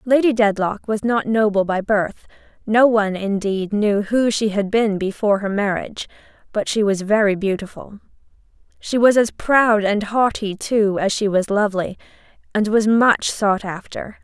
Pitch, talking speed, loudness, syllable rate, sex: 210 Hz, 155 wpm, -18 LUFS, 4.6 syllables/s, female